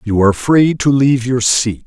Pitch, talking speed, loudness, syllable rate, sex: 125 Hz, 225 wpm, -13 LUFS, 5.1 syllables/s, male